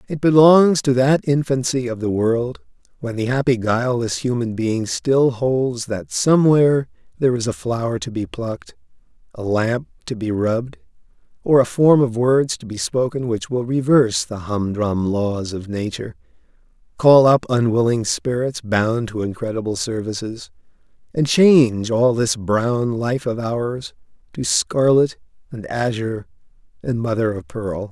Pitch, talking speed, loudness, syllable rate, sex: 120 Hz, 150 wpm, -19 LUFS, 4.5 syllables/s, male